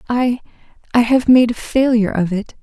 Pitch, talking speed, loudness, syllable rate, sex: 235 Hz, 160 wpm, -15 LUFS, 5.4 syllables/s, female